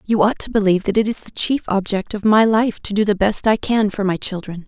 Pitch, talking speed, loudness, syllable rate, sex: 205 Hz, 280 wpm, -18 LUFS, 5.8 syllables/s, female